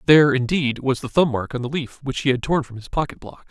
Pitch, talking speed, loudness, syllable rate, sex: 135 Hz, 290 wpm, -21 LUFS, 6.1 syllables/s, male